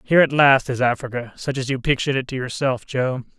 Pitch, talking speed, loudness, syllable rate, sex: 130 Hz, 230 wpm, -20 LUFS, 6.1 syllables/s, male